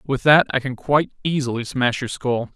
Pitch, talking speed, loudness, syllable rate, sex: 130 Hz, 210 wpm, -20 LUFS, 5.2 syllables/s, male